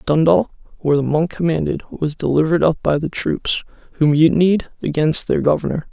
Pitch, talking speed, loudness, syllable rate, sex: 160 Hz, 150 wpm, -18 LUFS, 5.5 syllables/s, male